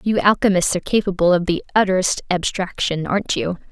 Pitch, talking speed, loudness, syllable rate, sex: 185 Hz, 160 wpm, -19 LUFS, 6.0 syllables/s, female